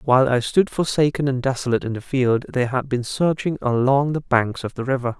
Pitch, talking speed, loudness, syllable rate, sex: 130 Hz, 220 wpm, -21 LUFS, 5.6 syllables/s, male